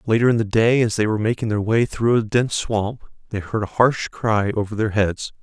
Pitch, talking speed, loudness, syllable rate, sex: 110 Hz, 245 wpm, -20 LUFS, 5.4 syllables/s, male